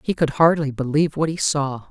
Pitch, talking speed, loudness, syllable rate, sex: 145 Hz, 220 wpm, -20 LUFS, 5.6 syllables/s, female